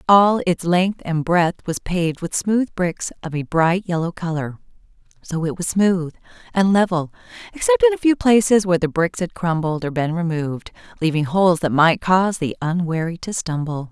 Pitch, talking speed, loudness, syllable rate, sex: 175 Hz, 185 wpm, -19 LUFS, 5.1 syllables/s, female